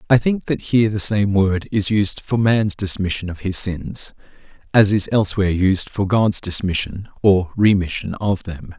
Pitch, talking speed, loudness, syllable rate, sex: 100 Hz, 180 wpm, -18 LUFS, 4.6 syllables/s, male